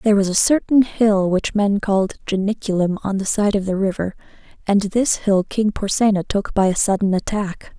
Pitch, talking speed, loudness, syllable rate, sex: 200 Hz, 195 wpm, -19 LUFS, 5.1 syllables/s, female